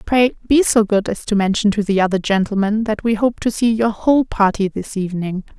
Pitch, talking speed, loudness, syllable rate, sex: 210 Hz, 225 wpm, -17 LUFS, 5.5 syllables/s, female